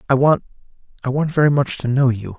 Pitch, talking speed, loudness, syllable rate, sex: 135 Hz, 200 wpm, -18 LUFS, 6.3 syllables/s, male